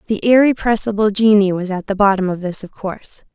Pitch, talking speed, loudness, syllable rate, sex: 200 Hz, 200 wpm, -16 LUFS, 5.8 syllables/s, female